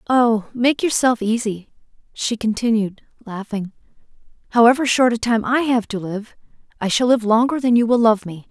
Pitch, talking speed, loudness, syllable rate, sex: 230 Hz, 170 wpm, -18 LUFS, 5.0 syllables/s, female